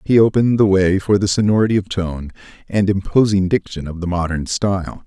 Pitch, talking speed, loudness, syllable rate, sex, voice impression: 95 Hz, 190 wpm, -17 LUFS, 5.7 syllables/s, male, masculine, middle-aged, thick, tensed, slightly powerful, slightly hard, slightly muffled, slightly raspy, cool, calm, mature, slightly friendly, wild, lively, slightly modest